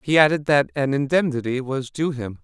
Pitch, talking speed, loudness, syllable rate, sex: 140 Hz, 195 wpm, -21 LUFS, 5.2 syllables/s, male